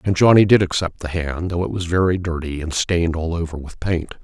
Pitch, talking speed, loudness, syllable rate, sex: 85 Hz, 240 wpm, -19 LUFS, 5.6 syllables/s, male